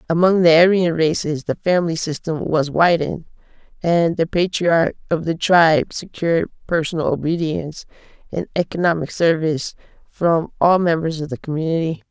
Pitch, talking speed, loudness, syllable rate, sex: 165 Hz, 135 wpm, -18 LUFS, 5.2 syllables/s, female